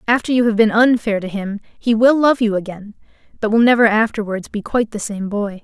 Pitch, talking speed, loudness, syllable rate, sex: 220 Hz, 225 wpm, -17 LUFS, 5.7 syllables/s, female